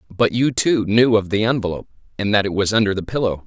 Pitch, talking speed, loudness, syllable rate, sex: 105 Hz, 245 wpm, -18 LUFS, 6.4 syllables/s, male